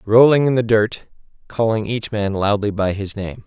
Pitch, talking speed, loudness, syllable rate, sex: 110 Hz, 190 wpm, -18 LUFS, 4.7 syllables/s, male